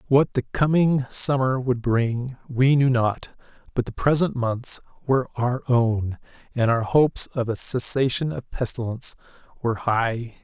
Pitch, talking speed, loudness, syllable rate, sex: 125 Hz, 150 wpm, -22 LUFS, 4.4 syllables/s, male